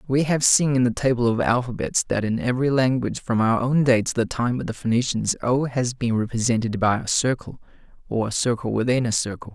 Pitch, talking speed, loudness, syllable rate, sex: 120 Hz, 220 wpm, -22 LUFS, 5.8 syllables/s, male